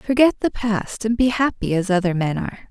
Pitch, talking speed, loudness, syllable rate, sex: 210 Hz, 220 wpm, -20 LUFS, 5.5 syllables/s, female